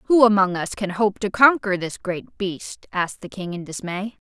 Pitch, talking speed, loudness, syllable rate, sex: 195 Hz, 210 wpm, -22 LUFS, 4.8 syllables/s, female